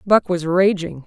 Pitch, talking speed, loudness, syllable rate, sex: 180 Hz, 170 wpm, -18 LUFS, 4.2 syllables/s, female